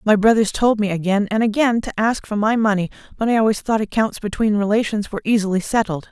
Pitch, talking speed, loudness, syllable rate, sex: 215 Hz, 215 wpm, -19 LUFS, 6.2 syllables/s, female